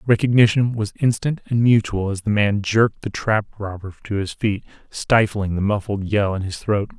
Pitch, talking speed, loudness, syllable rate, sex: 105 Hz, 190 wpm, -20 LUFS, 5.0 syllables/s, male